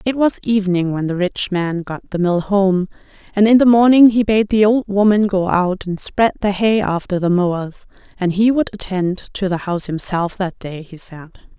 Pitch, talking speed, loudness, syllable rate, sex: 195 Hz, 210 wpm, -16 LUFS, 4.9 syllables/s, female